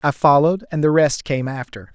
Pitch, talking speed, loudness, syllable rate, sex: 145 Hz, 215 wpm, -17 LUFS, 5.6 syllables/s, male